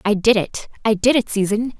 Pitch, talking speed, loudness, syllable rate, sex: 215 Hz, 200 wpm, -18 LUFS, 5.3 syllables/s, female